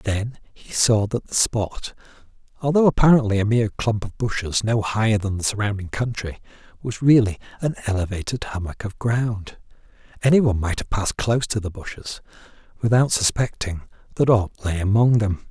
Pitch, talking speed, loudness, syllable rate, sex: 110 Hz, 160 wpm, -21 LUFS, 5.3 syllables/s, male